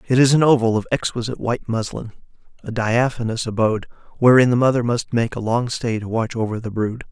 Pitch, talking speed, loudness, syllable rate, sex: 115 Hz, 200 wpm, -19 LUFS, 6.1 syllables/s, male